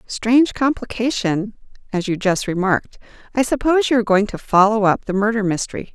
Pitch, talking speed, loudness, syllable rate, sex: 215 Hz, 170 wpm, -18 LUFS, 5.9 syllables/s, female